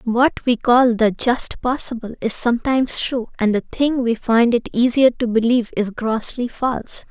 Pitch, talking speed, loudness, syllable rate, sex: 235 Hz, 175 wpm, -18 LUFS, 4.6 syllables/s, female